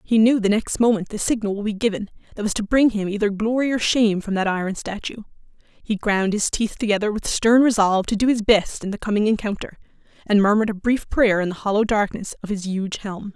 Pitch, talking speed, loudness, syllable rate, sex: 210 Hz, 235 wpm, -21 LUFS, 5.9 syllables/s, female